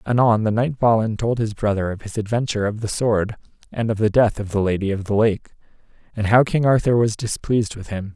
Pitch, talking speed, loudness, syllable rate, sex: 110 Hz, 230 wpm, -20 LUFS, 5.8 syllables/s, male